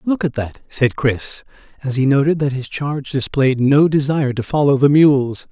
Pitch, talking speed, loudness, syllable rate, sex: 140 Hz, 195 wpm, -16 LUFS, 4.8 syllables/s, male